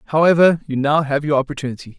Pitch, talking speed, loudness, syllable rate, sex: 145 Hz, 180 wpm, -17 LUFS, 7.2 syllables/s, male